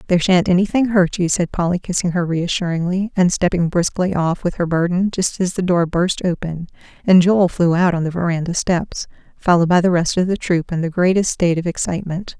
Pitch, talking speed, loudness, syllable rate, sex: 175 Hz, 215 wpm, -18 LUFS, 5.7 syllables/s, female